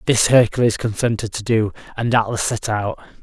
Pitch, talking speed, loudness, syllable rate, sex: 110 Hz, 170 wpm, -19 LUFS, 5.4 syllables/s, male